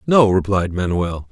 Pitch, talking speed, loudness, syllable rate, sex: 100 Hz, 135 wpm, -18 LUFS, 4.3 syllables/s, male